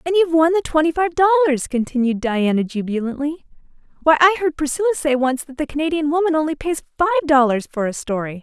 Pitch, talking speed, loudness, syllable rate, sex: 300 Hz, 190 wpm, -18 LUFS, 6.6 syllables/s, female